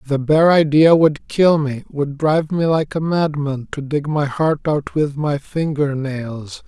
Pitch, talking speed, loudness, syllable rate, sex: 150 Hz, 180 wpm, -17 LUFS, 4.0 syllables/s, male